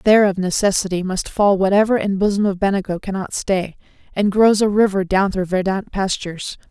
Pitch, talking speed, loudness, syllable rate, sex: 195 Hz, 180 wpm, -18 LUFS, 5.6 syllables/s, female